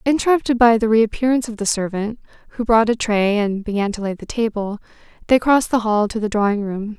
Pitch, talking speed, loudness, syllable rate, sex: 220 Hz, 215 wpm, -18 LUFS, 6.0 syllables/s, female